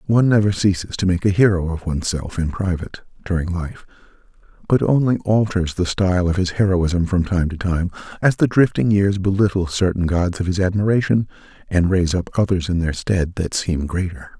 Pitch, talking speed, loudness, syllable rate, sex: 95 Hz, 190 wpm, -19 LUFS, 5.4 syllables/s, male